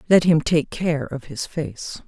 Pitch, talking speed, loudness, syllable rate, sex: 155 Hz, 205 wpm, -22 LUFS, 3.8 syllables/s, female